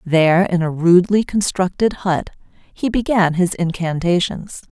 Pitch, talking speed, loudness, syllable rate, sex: 180 Hz, 125 wpm, -17 LUFS, 4.5 syllables/s, female